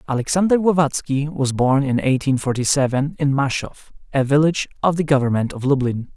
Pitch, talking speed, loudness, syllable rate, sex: 140 Hz, 165 wpm, -19 LUFS, 5.8 syllables/s, male